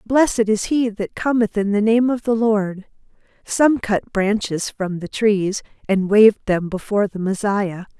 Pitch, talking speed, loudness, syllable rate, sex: 210 Hz, 175 wpm, -19 LUFS, 4.3 syllables/s, female